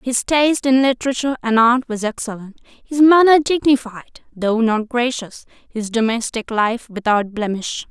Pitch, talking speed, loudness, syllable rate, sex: 240 Hz, 145 wpm, -17 LUFS, 4.8 syllables/s, female